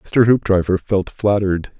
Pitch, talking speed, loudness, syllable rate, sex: 100 Hz, 135 wpm, -17 LUFS, 4.7 syllables/s, male